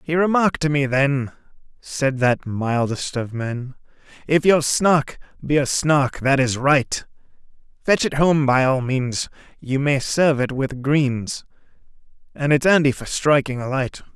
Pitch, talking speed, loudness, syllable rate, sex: 140 Hz, 155 wpm, -20 LUFS, 4.1 syllables/s, male